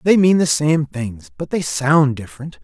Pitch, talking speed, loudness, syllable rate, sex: 145 Hz, 205 wpm, -17 LUFS, 4.5 syllables/s, male